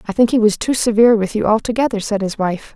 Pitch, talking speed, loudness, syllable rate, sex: 220 Hz, 260 wpm, -16 LUFS, 6.6 syllables/s, female